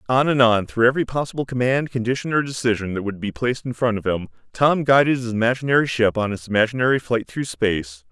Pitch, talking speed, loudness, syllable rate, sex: 120 Hz, 215 wpm, -20 LUFS, 6.4 syllables/s, male